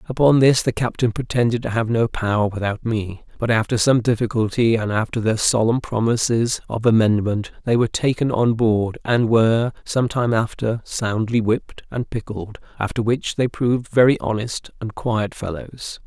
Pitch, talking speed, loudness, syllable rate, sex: 115 Hz, 170 wpm, -20 LUFS, 4.9 syllables/s, male